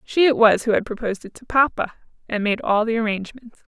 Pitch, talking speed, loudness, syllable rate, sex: 225 Hz, 225 wpm, -20 LUFS, 6.1 syllables/s, female